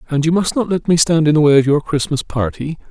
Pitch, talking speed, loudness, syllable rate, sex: 155 Hz, 290 wpm, -15 LUFS, 6.1 syllables/s, male